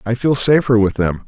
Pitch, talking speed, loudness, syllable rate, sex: 115 Hz, 235 wpm, -15 LUFS, 5.4 syllables/s, male